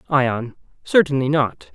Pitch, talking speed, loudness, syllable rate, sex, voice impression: 135 Hz, 105 wpm, -19 LUFS, 3.9 syllables/s, male, slightly masculine, slightly gender-neutral, adult-like, thick, tensed, slightly powerful, clear, nasal, intellectual, calm, unique, lively, slightly sharp